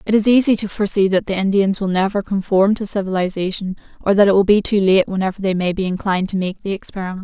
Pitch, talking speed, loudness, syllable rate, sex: 195 Hz, 240 wpm, -17 LUFS, 6.7 syllables/s, female